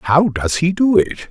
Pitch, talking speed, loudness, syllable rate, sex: 165 Hz, 230 wpm, -16 LUFS, 3.8 syllables/s, male